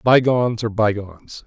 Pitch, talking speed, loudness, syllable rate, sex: 110 Hz, 125 wpm, -19 LUFS, 5.6 syllables/s, male